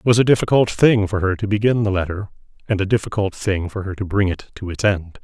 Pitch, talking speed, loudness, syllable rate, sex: 100 Hz, 265 wpm, -19 LUFS, 6.0 syllables/s, male